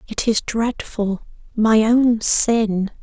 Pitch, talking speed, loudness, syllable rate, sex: 220 Hz, 120 wpm, -18 LUFS, 2.8 syllables/s, female